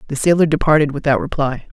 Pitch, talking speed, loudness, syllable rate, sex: 145 Hz, 170 wpm, -16 LUFS, 6.6 syllables/s, male